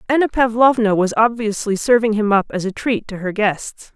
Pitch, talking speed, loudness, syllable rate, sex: 215 Hz, 195 wpm, -17 LUFS, 5.1 syllables/s, female